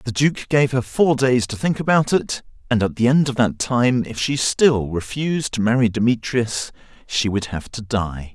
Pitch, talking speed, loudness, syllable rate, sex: 120 Hz, 210 wpm, -20 LUFS, 4.6 syllables/s, male